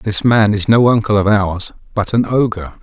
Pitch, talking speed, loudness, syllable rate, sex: 105 Hz, 210 wpm, -14 LUFS, 4.7 syllables/s, male